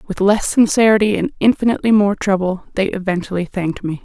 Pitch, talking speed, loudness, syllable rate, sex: 200 Hz, 165 wpm, -16 LUFS, 6.2 syllables/s, female